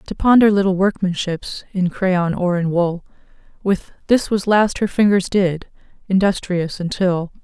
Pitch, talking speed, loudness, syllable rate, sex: 185 Hz, 145 wpm, -18 LUFS, 4.3 syllables/s, female